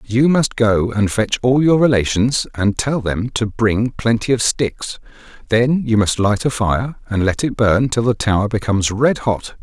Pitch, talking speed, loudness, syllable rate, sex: 115 Hz, 200 wpm, -17 LUFS, 4.3 syllables/s, male